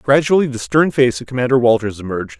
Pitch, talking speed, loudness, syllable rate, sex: 125 Hz, 200 wpm, -16 LUFS, 6.4 syllables/s, male